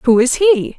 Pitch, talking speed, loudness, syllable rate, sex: 285 Hz, 230 wpm, -13 LUFS, 4.0 syllables/s, female